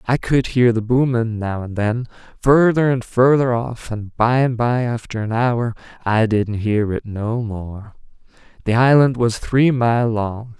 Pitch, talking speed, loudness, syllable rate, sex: 120 Hz, 175 wpm, -18 LUFS, 4.0 syllables/s, male